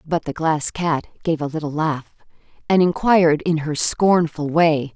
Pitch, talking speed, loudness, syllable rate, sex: 160 Hz, 170 wpm, -19 LUFS, 4.2 syllables/s, female